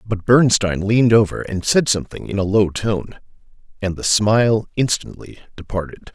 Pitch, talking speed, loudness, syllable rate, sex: 105 Hz, 155 wpm, -18 LUFS, 5.2 syllables/s, male